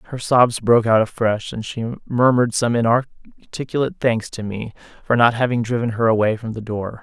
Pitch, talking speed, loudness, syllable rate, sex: 115 Hz, 190 wpm, -19 LUFS, 5.5 syllables/s, male